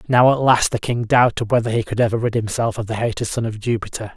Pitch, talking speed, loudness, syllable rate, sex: 115 Hz, 260 wpm, -19 LUFS, 6.3 syllables/s, male